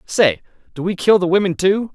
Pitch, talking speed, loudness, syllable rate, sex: 180 Hz, 215 wpm, -17 LUFS, 5.2 syllables/s, male